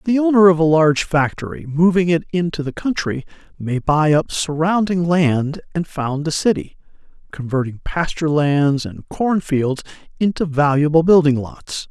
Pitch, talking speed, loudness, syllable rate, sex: 160 Hz, 150 wpm, -18 LUFS, 4.7 syllables/s, male